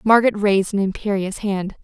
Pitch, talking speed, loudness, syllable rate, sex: 200 Hz, 165 wpm, -19 LUFS, 6.0 syllables/s, female